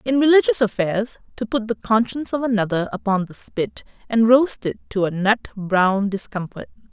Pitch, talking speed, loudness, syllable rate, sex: 220 Hz, 175 wpm, -20 LUFS, 5.1 syllables/s, female